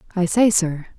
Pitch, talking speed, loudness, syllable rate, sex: 185 Hz, 180 wpm, -18 LUFS, 5.2 syllables/s, female